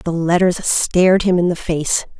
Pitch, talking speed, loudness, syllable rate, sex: 175 Hz, 190 wpm, -16 LUFS, 4.6 syllables/s, female